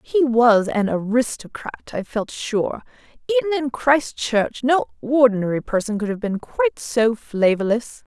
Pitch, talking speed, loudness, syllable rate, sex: 245 Hz, 145 wpm, -20 LUFS, 4.2 syllables/s, female